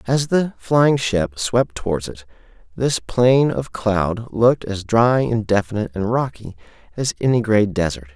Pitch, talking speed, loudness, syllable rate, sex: 110 Hz, 160 wpm, -19 LUFS, 4.3 syllables/s, male